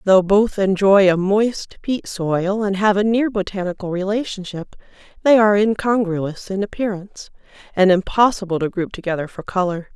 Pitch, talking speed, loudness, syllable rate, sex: 195 Hz, 150 wpm, -18 LUFS, 5.0 syllables/s, female